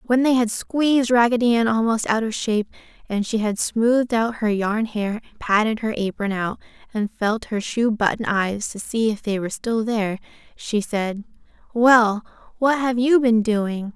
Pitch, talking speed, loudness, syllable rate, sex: 225 Hz, 185 wpm, -21 LUFS, 4.7 syllables/s, female